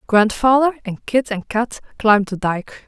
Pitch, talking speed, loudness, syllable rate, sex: 225 Hz, 165 wpm, -18 LUFS, 4.8 syllables/s, female